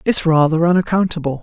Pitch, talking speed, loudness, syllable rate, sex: 165 Hz, 125 wpm, -15 LUFS, 6.1 syllables/s, male